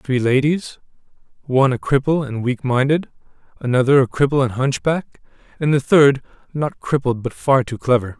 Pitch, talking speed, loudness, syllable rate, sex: 130 Hz, 160 wpm, -18 LUFS, 5.1 syllables/s, male